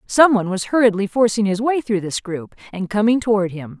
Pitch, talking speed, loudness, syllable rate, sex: 210 Hz, 220 wpm, -18 LUFS, 5.7 syllables/s, female